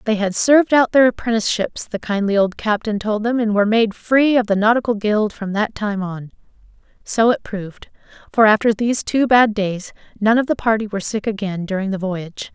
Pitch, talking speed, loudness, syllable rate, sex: 215 Hz, 205 wpm, -18 LUFS, 5.5 syllables/s, female